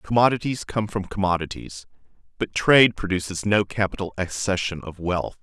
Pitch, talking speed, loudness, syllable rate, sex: 95 Hz, 135 wpm, -23 LUFS, 5.2 syllables/s, male